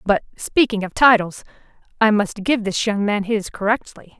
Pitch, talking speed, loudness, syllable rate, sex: 210 Hz, 155 wpm, -19 LUFS, 4.7 syllables/s, female